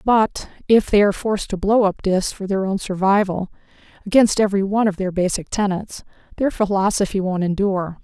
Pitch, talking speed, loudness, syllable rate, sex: 195 Hz, 165 wpm, -19 LUFS, 5.7 syllables/s, female